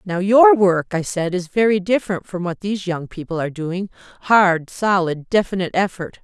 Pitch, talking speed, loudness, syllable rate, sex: 190 Hz, 175 wpm, -18 LUFS, 5.3 syllables/s, female